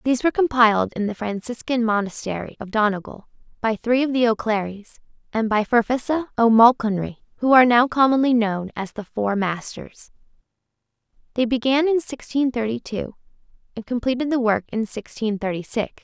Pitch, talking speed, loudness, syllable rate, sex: 230 Hz, 155 wpm, -21 LUFS, 5.4 syllables/s, female